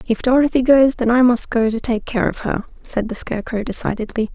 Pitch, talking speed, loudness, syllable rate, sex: 235 Hz, 220 wpm, -18 LUFS, 5.7 syllables/s, female